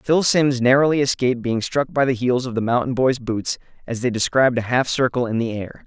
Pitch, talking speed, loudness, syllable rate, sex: 125 Hz, 235 wpm, -20 LUFS, 5.6 syllables/s, male